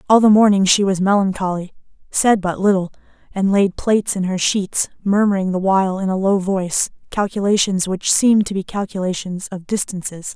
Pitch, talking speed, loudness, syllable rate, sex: 195 Hz, 175 wpm, -18 LUFS, 5.3 syllables/s, female